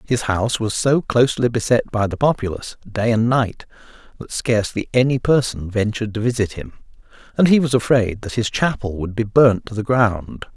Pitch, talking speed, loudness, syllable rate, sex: 115 Hz, 190 wpm, -19 LUFS, 5.5 syllables/s, male